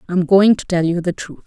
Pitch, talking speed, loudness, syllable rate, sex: 180 Hz, 285 wpm, -16 LUFS, 5.4 syllables/s, female